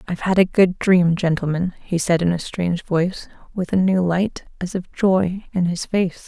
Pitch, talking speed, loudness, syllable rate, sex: 180 Hz, 210 wpm, -20 LUFS, 4.9 syllables/s, female